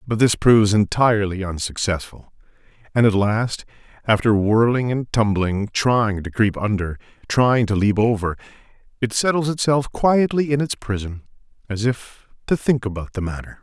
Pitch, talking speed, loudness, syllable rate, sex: 110 Hz, 150 wpm, -20 LUFS, 4.8 syllables/s, male